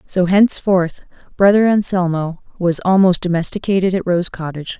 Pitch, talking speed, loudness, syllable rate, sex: 180 Hz, 125 wpm, -16 LUFS, 5.6 syllables/s, female